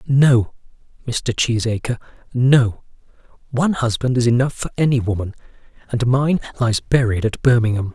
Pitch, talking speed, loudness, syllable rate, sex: 120 Hz, 130 wpm, -18 LUFS, 5.0 syllables/s, male